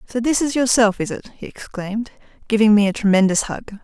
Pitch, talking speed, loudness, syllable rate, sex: 220 Hz, 205 wpm, -18 LUFS, 5.9 syllables/s, female